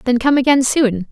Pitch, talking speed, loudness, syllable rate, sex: 250 Hz, 215 wpm, -14 LUFS, 5.2 syllables/s, female